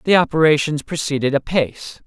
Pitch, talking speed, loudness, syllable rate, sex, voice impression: 150 Hz, 115 wpm, -18 LUFS, 5.9 syllables/s, male, masculine, adult-like, slightly halting, refreshing, slightly sincere, friendly